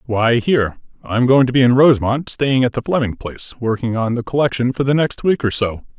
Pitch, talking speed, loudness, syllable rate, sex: 125 Hz, 230 wpm, -17 LUFS, 5.8 syllables/s, male